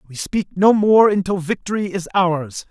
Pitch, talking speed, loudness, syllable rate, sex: 185 Hz, 180 wpm, -17 LUFS, 4.6 syllables/s, male